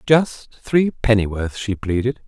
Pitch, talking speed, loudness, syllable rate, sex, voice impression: 115 Hz, 105 wpm, -20 LUFS, 3.8 syllables/s, male, very masculine, very adult-like, slightly old, very thick, relaxed, weak, slightly dark, slightly soft, very muffled, slightly halting, slightly raspy, cool, intellectual, very sincere, very calm, very mature, slightly friendly, slightly reassuring, unique, very elegant, sweet, slightly lively, kind